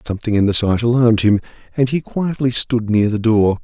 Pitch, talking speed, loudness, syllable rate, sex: 115 Hz, 215 wpm, -16 LUFS, 5.8 syllables/s, male